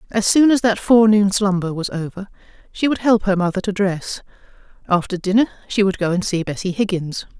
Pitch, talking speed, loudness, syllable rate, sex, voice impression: 200 Hz, 195 wpm, -18 LUFS, 5.7 syllables/s, female, feminine, very adult-like, slightly relaxed, slightly dark, muffled, slightly halting, calm, reassuring